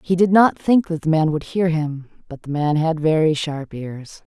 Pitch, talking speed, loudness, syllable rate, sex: 160 Hz, 235 wpm, -19 LUFS, 4.4 syllables/s, female